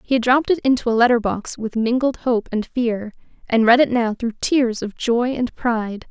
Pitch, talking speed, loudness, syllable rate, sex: 235 Hz, 225 wpm, -19 LUFS, 5.1 syllables/s, female